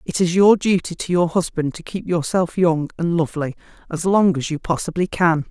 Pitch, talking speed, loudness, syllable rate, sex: 170 Hz, 205 wpm, -19 LUFS, 5.2 syllables/s, female